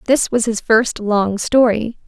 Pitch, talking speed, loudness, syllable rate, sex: 225 Hz, 175 wpm, -16 LUFS, 3.8 syllables/s, female